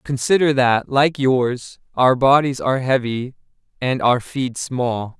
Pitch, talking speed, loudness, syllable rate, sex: 130 Hz, 140 wpm, -18 LUFS, 3.8 syllables/s, male